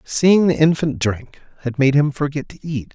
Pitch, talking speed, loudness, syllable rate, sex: 145 Hz, 205 wpm, -18 LUFS, 4.6 syllables/s, male